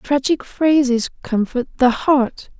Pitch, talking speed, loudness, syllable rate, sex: 260 Hz, 115 wpm, -18 LUFS, 3.4 syllables/s, female